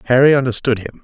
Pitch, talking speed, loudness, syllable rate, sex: 125 Hz, 175 wpm, -15 LUFS, 7.2 syllables/s, male